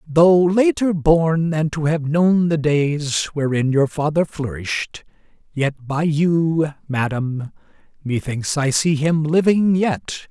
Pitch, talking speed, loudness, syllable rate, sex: 155 Hz, 135 wpm, -19 LUFS, 3.4 syllables/s, male